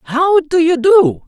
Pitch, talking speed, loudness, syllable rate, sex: 315 Hz, 190 wpm, -12 LUFS, 3.3 syllables/s, female